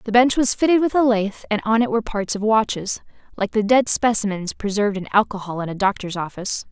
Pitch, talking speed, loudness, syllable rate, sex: 215 Hz, 225 wpm, -20 LUFS, 6.1 syllables/s, female